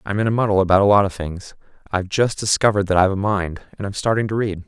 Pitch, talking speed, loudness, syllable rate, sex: 100 Hz, 255 wpm, -19 LUFS, 7.0 syllables/s, male